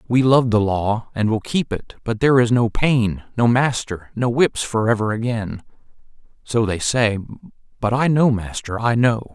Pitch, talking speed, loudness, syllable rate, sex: 115 Hz, 185 wpm, -19 LUFS, 4.6 syllables/s, male